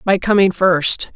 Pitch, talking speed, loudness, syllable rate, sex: 185 Hz, 155 wpm, -14 LUFS, 3.8 syllables/s, female